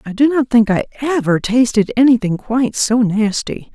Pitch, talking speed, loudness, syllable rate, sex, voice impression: 235 Hz, 175 wpm, -15 LUFS, 5.0 syllables/s, female, feminine, middle-aged, slightly relaxed, slightly weak, soft, fluent, intellectual, friendly, elegant, lively, strict, sharp